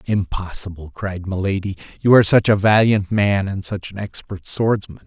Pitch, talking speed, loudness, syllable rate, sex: 100 Hz, 165 wpm, -19 LUFS, 5.0 syllables/s, male